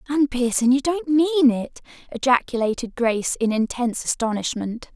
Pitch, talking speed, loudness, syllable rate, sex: 255 Hz, 135 wpm, -21 LUFS, 5.5 syllables/s, female